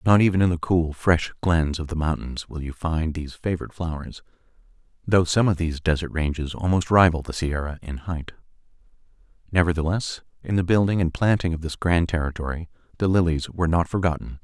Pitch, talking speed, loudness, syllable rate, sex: 85 Hz, 180 wpm, -23 LUFS, 5.8 syllables/s, male